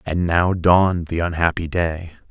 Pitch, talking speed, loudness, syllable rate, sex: 85 Hz, 155 wpm, -19 LUFS, 4.5 syllables/s, male